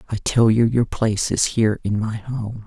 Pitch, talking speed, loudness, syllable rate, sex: 110 Hz, 225 wpm, -20 LUFS, 4.9 syllables/s, female